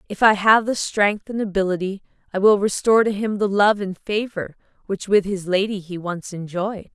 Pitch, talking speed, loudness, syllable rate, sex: 200 Hz, 200 wpm, -20 LUFS, 5.1 syllables/s, female